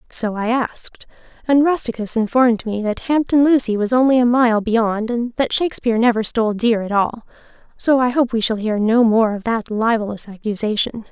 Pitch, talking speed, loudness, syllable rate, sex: 230 Hz, 190 wpm, -17 LUFS, 5.3 syllables/s, female